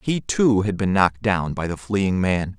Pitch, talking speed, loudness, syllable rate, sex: 100 Hz, 230 wpm, -21 LUFS, 4.4 syllables/s, male